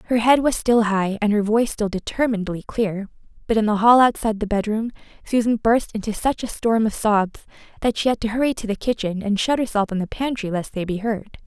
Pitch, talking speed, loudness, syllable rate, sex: 220 Hz, 225 wpm, -21 LUFS, 5.8 syllables/s, female